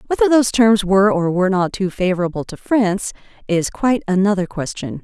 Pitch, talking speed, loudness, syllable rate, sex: 195 Hz, 180 wpm, -17 LUFS, 6.1 syllables/s, female